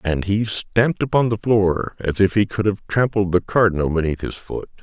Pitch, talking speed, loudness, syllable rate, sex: 100 Hz, 210 wpm, -20 LUFS, 5.1 syllables/s, male